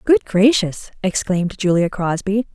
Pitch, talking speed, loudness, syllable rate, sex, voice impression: 195 Hz, 120 wpm, -18 LUFS, 4.4 syllables/s, female, feminine, adult-like, tensed, slightly powerful, slightly hard, fluent, slightly raspy, intellectual, calm, reassuring, elegant, lively, slightly sharp